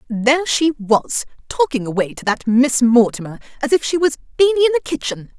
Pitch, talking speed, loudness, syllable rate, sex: 260 Hz, 190 wpm, -17 LUFS, 5.7 syllables/s, female